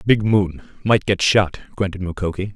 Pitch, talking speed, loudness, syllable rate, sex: 95 Hz, 140 wpm, -20 LUFS, 4.8 syllables/s, male